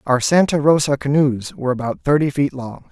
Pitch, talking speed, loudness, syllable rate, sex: 140 Hz, 185 wpm, -17 LUFS, 5.4 syllables/s, male